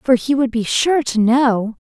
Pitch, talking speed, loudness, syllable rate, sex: 250 Hz, 230 wpm, -16 LUFS, 4.0 syllables/s, female